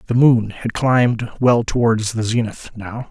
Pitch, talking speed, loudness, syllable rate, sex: 115 Hz, 175 wpm, -17 LUFS, 4.3 syllables/s, male